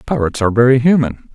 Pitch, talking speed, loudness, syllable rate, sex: 120 Hz, 180 wpm, -14 LUFS, 6.6 syllables/s, male